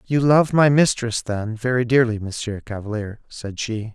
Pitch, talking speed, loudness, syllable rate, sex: 120 Hz, 165 wpm, -20 LUFS, 4.6 syllables/s, male